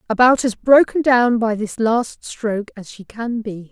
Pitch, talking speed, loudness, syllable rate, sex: 230 Hz, 195 wpm, -17 LUFS, 4.3 syllables/s, female